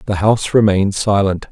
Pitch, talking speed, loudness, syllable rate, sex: 100 Hz, 160 wpm, -15 LUFS, 6.1 syllables/s, male